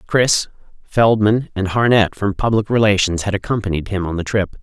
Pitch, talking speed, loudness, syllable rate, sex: 100 Hz, 170 wpm, -17 LUFS, 5.2 syllables/s, male